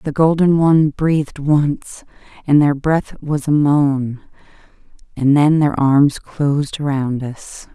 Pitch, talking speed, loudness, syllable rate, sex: 145 Hz, 140 wpm, -16 LUFS, 3.7 syllables/s, female